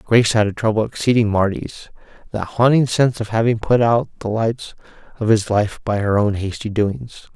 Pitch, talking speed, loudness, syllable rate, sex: 110 Hz, 180 wpm, -18 LUFS, 5.1 syllables/s, male